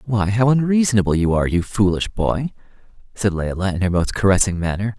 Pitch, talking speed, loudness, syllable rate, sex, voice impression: 100 Hz, 180 wpm, -19 LUFS, 6.1 syllables/s, male, masculine, adult-like, thin, slightly weak, bright, slightly cool, slightly intellectual, refreshing, sincere, friendly, unique, kind, modest